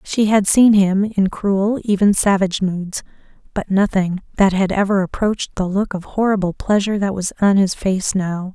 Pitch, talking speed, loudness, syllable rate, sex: 195 Hz, 185 wpm, -17 LUFS, 4.8 syllables/s, female